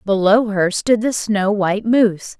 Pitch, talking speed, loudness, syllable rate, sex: 210 Hz, 175 wpm, -16 LUFS, 4.4 syllables/s, female